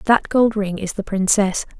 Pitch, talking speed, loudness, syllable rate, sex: 205 Hz, 200 wpm, -19 LUFS, 4.6 syllables/s, female